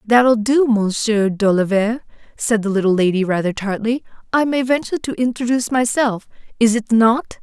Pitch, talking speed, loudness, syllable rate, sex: 225 Hz, 155 wpm, -17 LUFS, 5.0 syllables/s, female